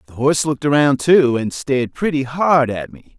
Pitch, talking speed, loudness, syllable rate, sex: 135 Hz, 205 wpm, -17 LUFS, 5.3 syllables/s, male